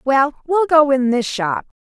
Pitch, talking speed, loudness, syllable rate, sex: 275 Hz, 195 wpm, -16 LUFS, 4.1 syllables/s, female